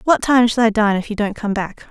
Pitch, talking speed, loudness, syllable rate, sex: 220 Hz, 345 wpm, -17 LUFS, 5.9 syllables/s, female